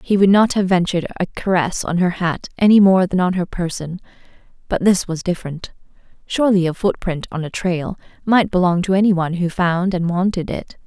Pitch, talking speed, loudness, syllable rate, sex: 180 Hz, 195 wpm, -18 LUFS, 5.6 syllables/s, female